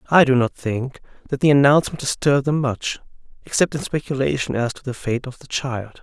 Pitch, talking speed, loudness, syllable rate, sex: 130 Hz, 200 wpm, -20 LUFS, 5.7 syllables/s, male